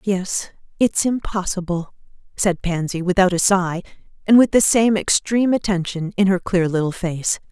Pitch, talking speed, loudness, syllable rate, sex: 190 Hz, 150 wpm, -19 LUFS, 4.7 syllables/s, female